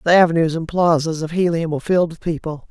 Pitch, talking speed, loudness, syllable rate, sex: 165 Hz, 220 wpm, -18 LUFS, 6.5 syllables/s, female